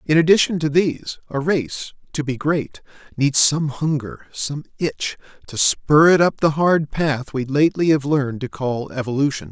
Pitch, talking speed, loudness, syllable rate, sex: 140 Hz, 175 wpm, -19 LUFS, 4.6 syllables/s, male